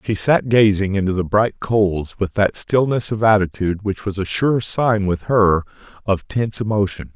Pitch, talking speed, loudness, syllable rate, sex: 100 Hz, 185 wpm, -18 LUFS, 4.9 syllables/s, male